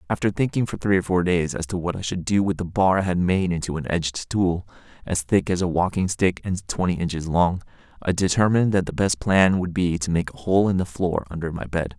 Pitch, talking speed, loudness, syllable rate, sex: 90 Hz, 255 wpm, -22 LUFS, 5.7 syllables/s, male